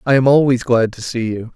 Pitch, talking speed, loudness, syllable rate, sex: 125 Hz, 270 wpm, -16 LUFS, 5.6 syllables/s, male